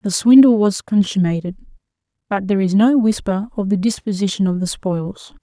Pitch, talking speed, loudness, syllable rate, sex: 200 Hz, 165 wpm, -17 LUFS, 5.3 syllables/s, female